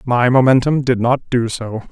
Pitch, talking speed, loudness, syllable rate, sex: 125 Hz, 190 wpm, -15 LUFS, 4.7 syllables/s, male